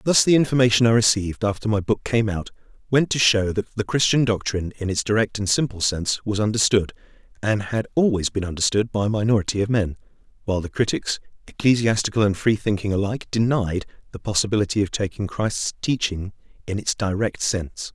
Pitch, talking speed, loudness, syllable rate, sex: 105 Hz, 175 wpm, -22 LUFS, 6.0 syllables/s, male